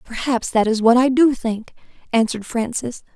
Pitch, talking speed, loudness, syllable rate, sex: 235 Hz, 170 wpm, -18 LUFS, 5.0 syllables/s, female